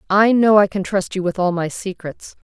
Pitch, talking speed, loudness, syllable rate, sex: 195 Hz, 240 wpm, -17 LUFS, 5.0 syllables/s, female